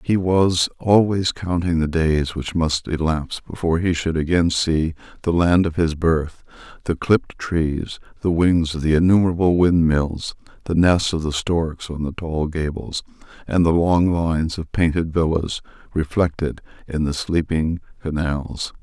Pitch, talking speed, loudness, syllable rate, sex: 80 Hz, 155 wpm, -20 LUFS, 4.4 syllables/s, male